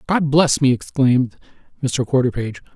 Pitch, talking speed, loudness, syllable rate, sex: 135 Hz, 130 wpm, -18 LUFS, 5.3 syllables/s, male